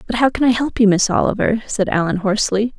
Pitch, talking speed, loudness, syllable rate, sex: 215 Hz, 235 wpm, -17 LUFS, 6.3 syllables/s, female